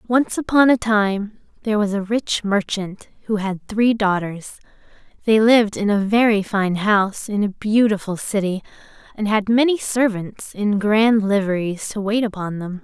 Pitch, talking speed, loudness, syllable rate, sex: 210 Hz, 165 wpm, -19 LUFS, 4.6 syllables/s, female